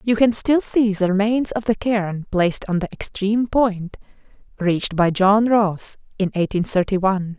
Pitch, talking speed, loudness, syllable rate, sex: 200 Hz, 180 wpm, -19 LUFS, 4.7 syllables/s, female